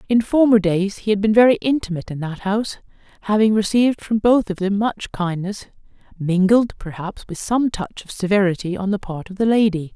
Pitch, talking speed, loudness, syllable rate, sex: 205 Hz, 195 wpm, -19 LUFS, 5.5 syllables/s, female